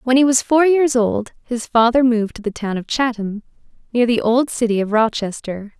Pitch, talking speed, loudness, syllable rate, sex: 235 Hz, 205 wpm, -17 LUFS, 5.1 syllables/s, female